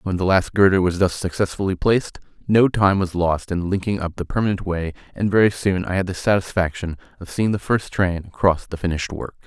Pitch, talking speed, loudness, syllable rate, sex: 95 Hz, 215 wpm, -20 LUFS, 5.7 syllables/s, male